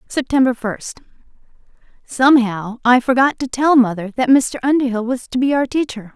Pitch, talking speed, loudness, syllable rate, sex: 250 Hz, 145 wpm, -16 LUFS, 5.3 syllables/s, female